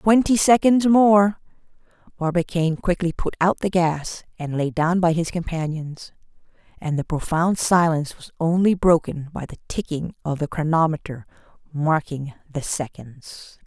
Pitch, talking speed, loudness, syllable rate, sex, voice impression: 165 Hz, 135 wpm, -21 LUFS, 4.6 syllables/s, female, feminine, very adult-like, slightly clear, slightly fluent, slightly calm